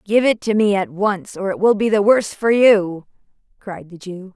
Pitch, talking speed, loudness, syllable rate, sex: 200 Hz, 235 wpm, -17 LUFS, 4.8 syllables/s, female